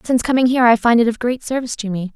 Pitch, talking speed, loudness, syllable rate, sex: 235 Hz, 305 wpm, -16 LUFS, 7.8 syllables/s, female